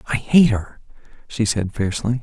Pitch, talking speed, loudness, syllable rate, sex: 115 Hz, 160 wpm, -19 LUFS, 5.2 syllables/s, male